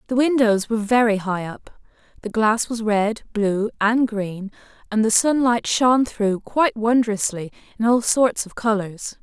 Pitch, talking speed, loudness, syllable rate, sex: 220 Hz, 165 wpm, -20 LUFS, 4.4 syllables/s, female